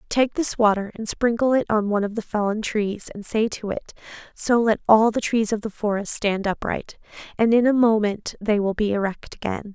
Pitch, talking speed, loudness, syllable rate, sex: 215 Hz, 215 wpm, -22 LUFS, 5.2 syllables/s, female